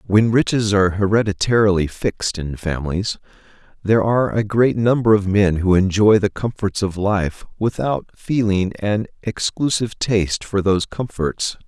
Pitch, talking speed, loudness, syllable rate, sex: 100 Hz, 145 wpm, -19 LUFS, 4.9 syllables/s, male